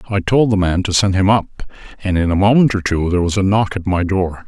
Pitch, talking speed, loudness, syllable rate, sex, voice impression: 95 Hz, 280 wpm, -16 LUFS, 6.3 syllables/s, male, masculine, slightly old, thick, cool, slightly intellectual, calm, slightly wild